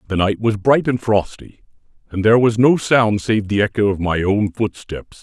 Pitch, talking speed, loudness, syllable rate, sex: 110 Hz, 205 wpm, -17 LUFS, 4.8 syllables/s, male